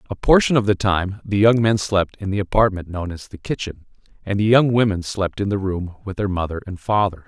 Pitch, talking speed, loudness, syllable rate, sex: 100 Hz, 240 wpm, -20 LUFS, 5.5 syllables/s, male